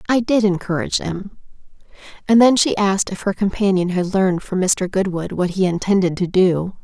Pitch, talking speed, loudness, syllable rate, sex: 190 Hz, 185 wpm, -18 LUFS, 5.4 syllables/s, female